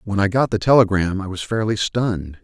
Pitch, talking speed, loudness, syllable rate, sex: 100 Hz, 220 wpm, -19 LUFS, 5.6 syllables/s, male